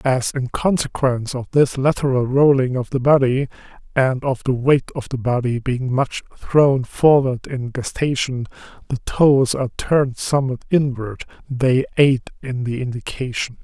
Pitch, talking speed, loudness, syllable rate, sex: 130 Hz, 150 wpm, -19 LUFS, 4.5 syllables/s, male